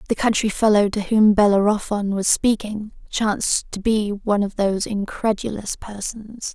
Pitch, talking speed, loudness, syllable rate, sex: 210 Hz, 145 wpm, -20 LUFS, 4.7 syllables/s, female